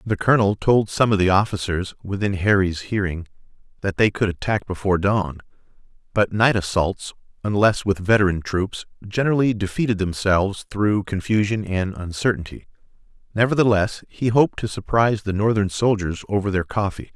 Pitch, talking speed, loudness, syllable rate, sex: 100 Hz, 145 wpm, -21 LUFS, 5.4 syllables/s, male